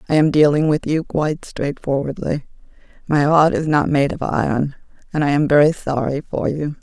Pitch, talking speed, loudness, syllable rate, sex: 145 Hz, 185 wpm, -18 LUFS, 5.2 syllables/s, female